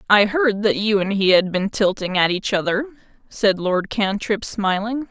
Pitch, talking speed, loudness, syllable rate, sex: 210 Hz, 190 wpm, -19 LUFS, 4.4 syllables/s, female